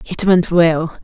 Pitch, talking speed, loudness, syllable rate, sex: 170 Hz, 175 wpm, -14 LUFS, 5.0 syllables/s, female